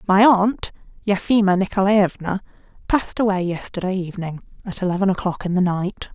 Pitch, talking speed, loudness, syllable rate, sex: 190 Hz, 135 wpm, -20 LUFS, 5.7 syllables/s, female